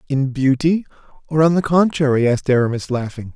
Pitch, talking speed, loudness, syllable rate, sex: 140 Hz, 160 wpm, -17 LUFS, 5.9 syllables/s, male